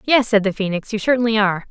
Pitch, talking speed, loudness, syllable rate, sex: 215 Hz, 245 wpm, -18 LUFS, 6.9 syllables/s, female